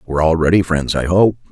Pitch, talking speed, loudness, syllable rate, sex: 85 Hz, 240 wpm, -15 LUFS, 7.1 syllables/s, male